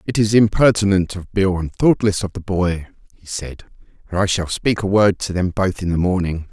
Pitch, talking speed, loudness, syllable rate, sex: 95 Hz, 220 wpm, -18 LUFS, 5.4 syllables/s, male